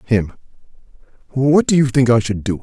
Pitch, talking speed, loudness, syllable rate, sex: 120 Hz, 185 wpm, -16 LUFS, 5.1 syllables/s, male